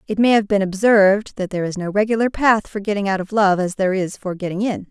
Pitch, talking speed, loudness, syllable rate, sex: 200 Hz, 270 wpm, -18 LUFS, 6.3 syllables/s, female